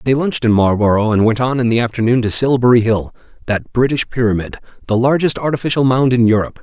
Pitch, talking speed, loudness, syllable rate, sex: 120 Hz, 200 wpm, -15 LUFS, 6.5 syllables/s, male